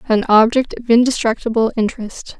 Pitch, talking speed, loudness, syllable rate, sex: 230 Hz, 125 wpm, -15 LUFS, 5.6 syllables/s, female